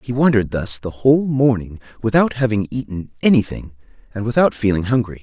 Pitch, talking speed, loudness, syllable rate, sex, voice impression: 115 Hz, 160 wpm, -18 LUFS, 5.8 syllables/s, male, very masculine, very adult-like, slightly thick, slightly tensed, slightly powerful, bright, soft, very clear, fluent, cool, intellectual, very refreshing, slightly sincere, calm, slightly mature, friendly, reassuring, slightly unique, slightly elegant, wild, slightly sweet, lively, kind, slightly intense